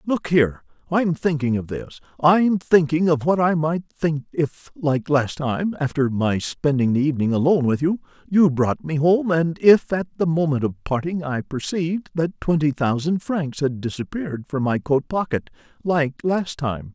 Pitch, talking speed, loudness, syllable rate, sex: 155 Hz, 180 wpm, -21 LUFS, 4.6 syllables/s, male